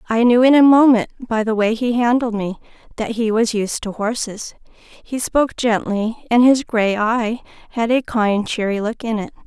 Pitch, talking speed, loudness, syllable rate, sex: 230 Hz, 195 wpm, -17 LUFS, 4.7 syllables/s, female